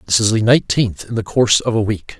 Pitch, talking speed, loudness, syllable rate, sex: 110 Hz, 275 wpm, -16 LUFS, 6.3 syllables/s, male